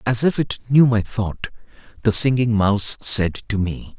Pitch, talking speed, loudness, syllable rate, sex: 110 Hz, 180 wpm, -19 LUFS, 4.4 syllables/s, male